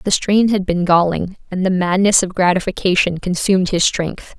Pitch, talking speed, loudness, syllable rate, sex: 185 Hz, 180 wpm, -16 LUFS, 5.0 syllables/s, female